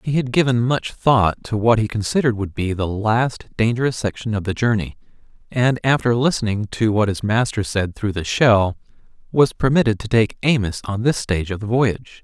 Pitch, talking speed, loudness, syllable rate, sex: 110 Hz, 195 wpm, -19 LUFS, 5.3 syllables/s, male